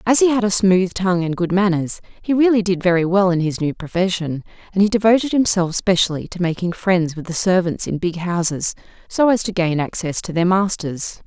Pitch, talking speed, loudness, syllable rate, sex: 185 Hz, 215 wpm, -18 LUFS, 5.5 syllables/s, female